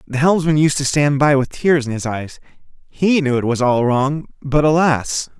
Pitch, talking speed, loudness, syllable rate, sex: 140 Hz, 210 wpm, -17 LUFS, 4.6 syllables/s, male